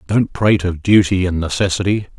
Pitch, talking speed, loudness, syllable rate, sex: 95 Hz, 165 wpm, -16 LUFS, 5.6 syllables/s, male